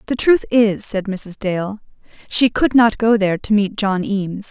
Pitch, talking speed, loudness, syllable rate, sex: 210 Hz, 200 wpm, -17 LUFS, 4.5 syllables/s, female